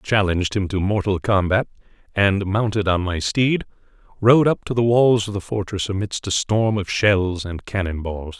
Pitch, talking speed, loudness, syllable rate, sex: 100 Hz, 195 wpm, -20 LUFS, 4.9 syllables/s, male